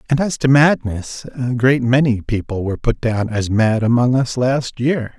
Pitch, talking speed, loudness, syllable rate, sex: 125 Hz, 195 wpm, -17 LUFS, 4.4 syllables/s, male